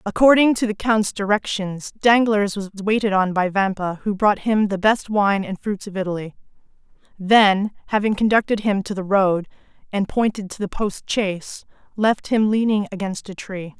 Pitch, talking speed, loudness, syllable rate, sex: 205 Hz, 175 wpm, -20 LUFS, 4.8 syllables/s, female